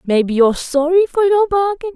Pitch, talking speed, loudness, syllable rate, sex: 335 Hz, 185 wpm, -15 LUFS, 5.4 syllables/s, female